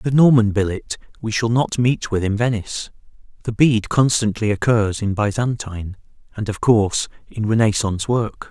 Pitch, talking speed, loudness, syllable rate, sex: 110 Hz, 155 wpm, -19 LUFS, 5.0 syllables/s, male